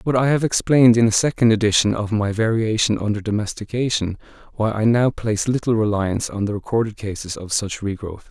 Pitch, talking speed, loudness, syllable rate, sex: 110 Hz, 190 wpm, -20 LUFS, 5.9 syllables/s, male